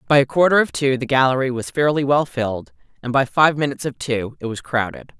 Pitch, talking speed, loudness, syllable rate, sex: 135 Hz, 230 wpm, -19 LUFS, 6.0 syllables/s, female